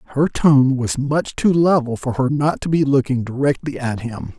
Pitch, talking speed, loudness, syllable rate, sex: 140 Hz, 205 wpm, -18 LUFS, 4.7 syllables/s, male